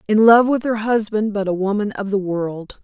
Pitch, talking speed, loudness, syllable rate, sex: 205 Hz, 230 wpm, -18 LUFS, 4.9 syllables/s, female